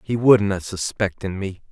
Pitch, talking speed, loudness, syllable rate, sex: 100 Hz, 175 wpm, -20 LUFS, 3.9 syllables/s, male